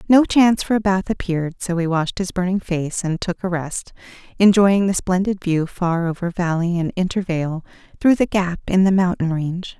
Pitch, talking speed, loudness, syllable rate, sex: 180 Hz, 195 wpm, -19 LUFS, 5.2 syllables/s, female